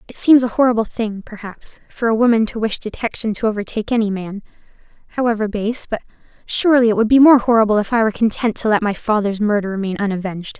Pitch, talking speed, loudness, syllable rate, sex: 220 Hz, 205 wpm, -17 LUFS, 6.6 syllables/s, female